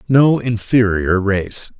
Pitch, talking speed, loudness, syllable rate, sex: 110 Hz, 100 wpm, -16 LUFS, 3.2 syllables/s, male